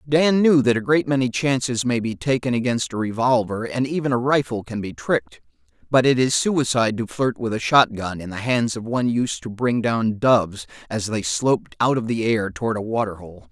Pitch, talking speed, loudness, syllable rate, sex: 120 Hz, 220 wpm, -21 LUFS, 5.3 syllables/s, male